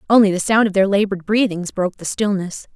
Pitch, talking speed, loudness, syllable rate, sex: 200 Hz, 215 wpm, -18 LUFS, 6.4 syllables/s, female